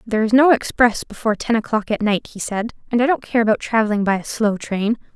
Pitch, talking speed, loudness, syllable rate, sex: 220 Hz, 245 wpm, -19 LUFS, 6.2 syllables/s, female